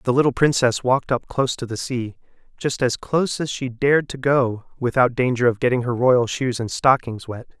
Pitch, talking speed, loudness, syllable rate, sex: 125 Hz, 215 wpm, -20 LUFS, 5.4 syllables/s, male